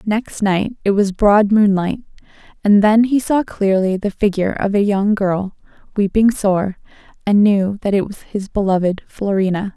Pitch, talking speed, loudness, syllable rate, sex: 200 Hz, 165 wpm, -16 LUFS, 4.5 syllables/s, female